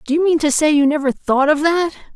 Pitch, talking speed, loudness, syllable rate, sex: 300 Hz, 280 wpm, -16 LUFS, 6.1 syllables/s, female